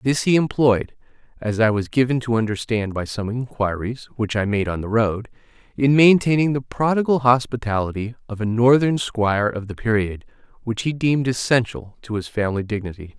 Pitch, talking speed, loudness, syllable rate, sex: 115 Hz, 175 wpm, -20 LUFS, 4.0 syllables/s, male